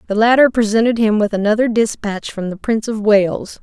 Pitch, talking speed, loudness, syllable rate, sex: 215 Hz, 200 wpm, -16 LUFS, 5.5 syllables/s, female